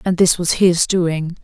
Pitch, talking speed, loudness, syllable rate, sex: 175 Hz, 210 wpm, -16 LUFS, 3.8 syllables/s, female